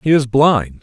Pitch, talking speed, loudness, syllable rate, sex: 130 Hz, 220 wpm, -14 LUFS, 3.8 syllables/s, male